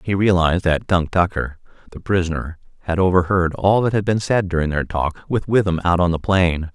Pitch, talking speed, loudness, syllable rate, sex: 90 Hz, 205 wpm, -19 LUFS, 5.4 syllables/s, male